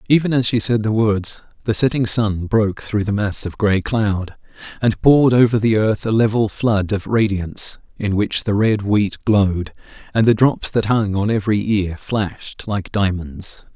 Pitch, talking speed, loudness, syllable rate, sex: 105 Hz, 190 wpm, -18 LUFS, 4.6 syllables/s, male